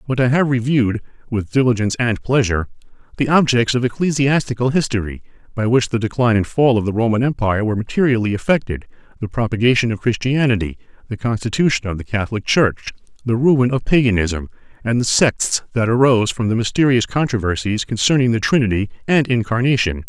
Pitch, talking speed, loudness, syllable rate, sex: 120 Hz, 160 wpm, -17 LUFS, 6.2 syllables/s, male